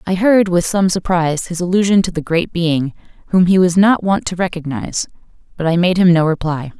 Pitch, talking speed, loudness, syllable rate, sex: 175 Hz, 210 wpm, -15 LUFS, 5.6 syllables/s, female